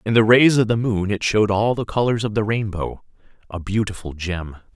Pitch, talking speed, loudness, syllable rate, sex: 105 Hz, 200 wpm, -20 LUFS, 5.4 syllables/s, male